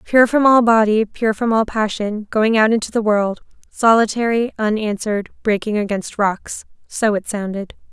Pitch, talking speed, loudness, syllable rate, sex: 215 Hz, 150 wpm, -17 LUFS, 4.7 syllables/s, female